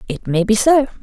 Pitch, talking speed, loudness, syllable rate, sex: 225 Hz, 235 wpm, -15 LUFS, 5.4 syllables/s, female